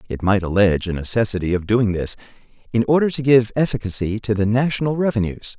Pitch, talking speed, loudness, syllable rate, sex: 110 Hz, 185 wpm, -19 LUFS, 6.2 syllables/s, male